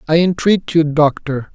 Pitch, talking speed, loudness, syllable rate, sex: 160 Hz, 155 wpm, -15 LUFS, 4.3 syllables/s, male